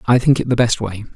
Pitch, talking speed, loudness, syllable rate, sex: 115 Hz, 315 wpm, -17 LUFS, 6.2 syllables/s, male